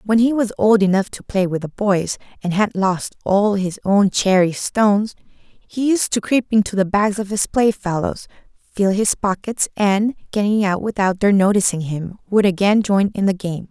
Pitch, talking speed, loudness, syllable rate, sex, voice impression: 200 Hz, 195 wpm, -18 LUFS, 4.5 syllables/s, female, very feminine, slightly young, very thin, tensed, slightly weak, very bright, hard, clear, very cute, intellectual, refreshing, very sincere, very calm, very friendly, very reassuring, very unique, very elegant, slightly wild, kind, very modest